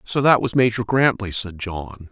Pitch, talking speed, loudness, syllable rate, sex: 110 Hz, 200 wpm, -20 LUFS, 4.5 syllables/s, male